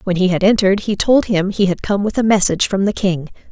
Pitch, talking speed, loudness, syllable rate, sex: 195 Hz, 275 wpm, -16 LUFS, 6.2 syllables/s, female